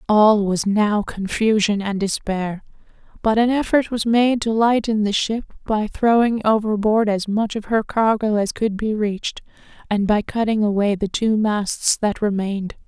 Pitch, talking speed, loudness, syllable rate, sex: 215 Hz, 165 wpm, -19 LUFS, 4.4 syllables/s, female